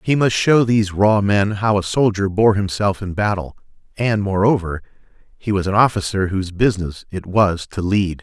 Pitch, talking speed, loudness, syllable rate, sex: 100 Hz, 180 wpm, -18 LUFS, 5.0 syllables/s, male